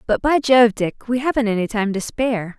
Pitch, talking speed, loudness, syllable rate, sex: 230 Hz, 230 wpm, -18 LUFS, 4.9 syllables/s, female